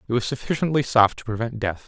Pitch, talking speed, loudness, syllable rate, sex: 120 Hz, 225 wpm, -22 LUFS, 6.5 syllables/s, male